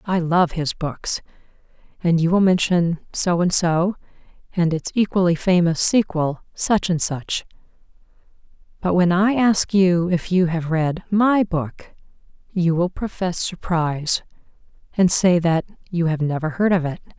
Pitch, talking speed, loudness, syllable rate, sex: 175 Hz, 150 wpm, -20 LUFS, 4.2 syllables/s, female